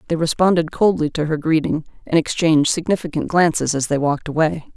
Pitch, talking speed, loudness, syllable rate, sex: 160 Hz, 175 wpm, -18 LUFS, 6.1 syllables/s, female